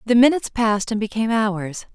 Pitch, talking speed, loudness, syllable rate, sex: 220 Hz, 185 wpm, -20 LUFS, 6.2 syllables/s, female